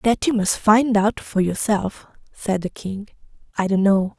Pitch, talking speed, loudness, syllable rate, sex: 205 Hz, 185 wpm, -20 LUFS, 4.1 syllables/s, female